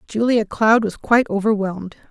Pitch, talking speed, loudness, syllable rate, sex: 215 Hz, 140 wpm, -18 LUFS, 5.5 syllables/s, female